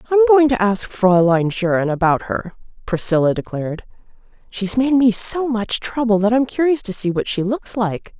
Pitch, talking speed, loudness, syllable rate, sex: 220 Hz, 185 wpm, -17 LUFS, 4.9 syllables/s, female